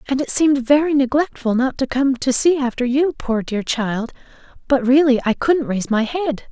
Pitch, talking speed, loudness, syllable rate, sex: 265 Hz, 205 wpm, -18 LUFS, 5.1 syllables/s, female